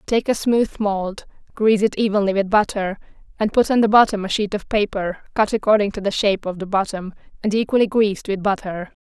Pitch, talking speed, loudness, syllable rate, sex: 205 Hz, 205 wpm, -19 LUFS, 5.8 syllables/s, female